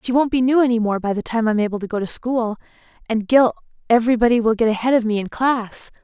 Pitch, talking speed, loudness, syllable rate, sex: 230 Hz, 240 wpm, -19 LUFS, 6.4 syllables/s, female